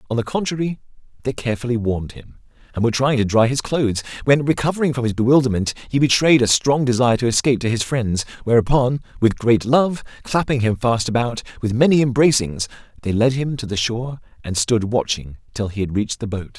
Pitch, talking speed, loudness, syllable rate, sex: 120 Hz, 200 wpm, -19 LUFS, 6.1 syllables/s, male